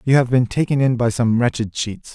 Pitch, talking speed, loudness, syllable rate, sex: 120 Hz, 250 wpm, -18 LUFS, 5.4 syllables/s, male